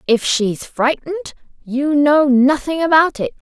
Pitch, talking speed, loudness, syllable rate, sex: 290 Hz, 120 wpm, -16 LUFS, 4.4 syllables/s, female